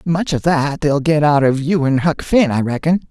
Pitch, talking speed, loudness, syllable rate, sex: 150 Hz, 250 wpm, -16 LUFS, 4.7 syllables/s, male